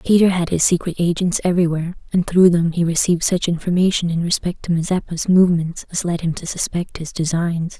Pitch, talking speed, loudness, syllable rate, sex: 170 Hz, 200 wpm, -18 LUFS, 6.0 syllables/s, female